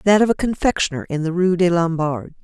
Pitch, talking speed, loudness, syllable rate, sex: 175 Hz, 220 wpm, -19 LUFS, 5.8 syllables/s, female